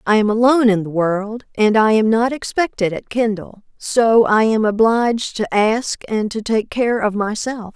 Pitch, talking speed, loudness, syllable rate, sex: 220 Hz, 195 wpm, -17 LUFS, 4.4 syllables/s, female